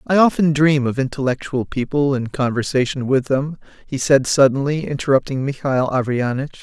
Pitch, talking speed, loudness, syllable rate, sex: 135 Hz, 145 wpm, -18 LUFS, 5.4 syllables/s, male